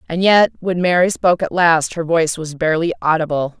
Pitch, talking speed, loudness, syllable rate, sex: 165 Hz, 200 wpm, -16 LUFS, 5.9 syllables/s, female